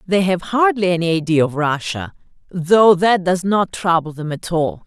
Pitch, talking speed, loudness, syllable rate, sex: 175 Hz, 185 wpm, -17 LUFS, 4.6 syllables/s, female